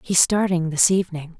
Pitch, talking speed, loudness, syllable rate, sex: 175 Hz, 170 wpm, -19 LUFS, 5.4 syllables/s, female